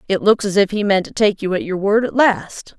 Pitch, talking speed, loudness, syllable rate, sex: 200 Hz, 300 wpm, -17 LUFS, 5.4 syllables/s, female